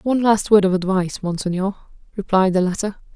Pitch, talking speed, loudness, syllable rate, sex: 195 Hz, 170 wpm, -19 LUFS, 6.3 syllables/s, female